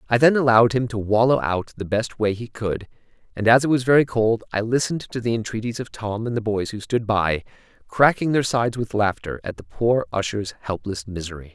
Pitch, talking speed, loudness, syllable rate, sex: 110 Hz, 220 wpm, -22 LUFS, 5.7 syllables/s, male